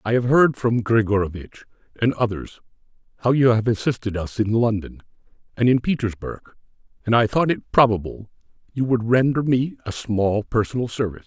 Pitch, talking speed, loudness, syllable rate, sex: 115 Hz, 160 wpm, -21 LUFS, 5.4 syllables/s, male